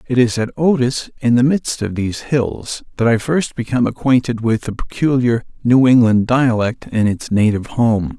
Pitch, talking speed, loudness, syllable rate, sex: 120 Hz, 185 wpm, -16 LUFS, 4.9 syllables/s, male